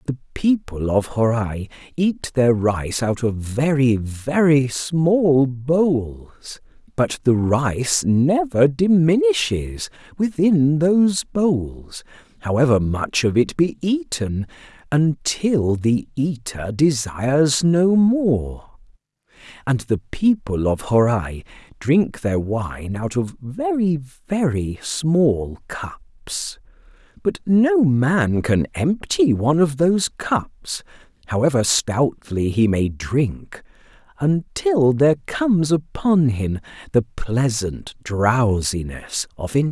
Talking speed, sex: 100 wpm, male